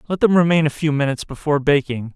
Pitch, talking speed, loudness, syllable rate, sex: 150 Hz, 225 wpm, -18 LUFS, 7.1 syllables/s, male